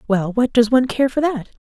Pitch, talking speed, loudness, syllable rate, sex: 240 Hz, 260 wpm, -17 LUFS, 5.9 syllables/s, female